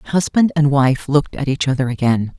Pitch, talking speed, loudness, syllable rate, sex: 140 Hz, 200 wpm, -17 LUFS, 5.2 syllables/s, female